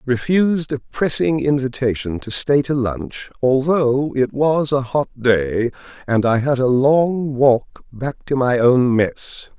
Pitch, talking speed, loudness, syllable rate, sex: 135 Hz, 155 wpm, -18 LUFS, 3.7 syllables/s, male